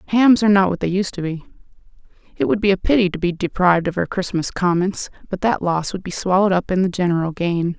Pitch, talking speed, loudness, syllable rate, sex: 185 Hz, 240 wpm, -19 LUFS, 6.4 syllables/s, female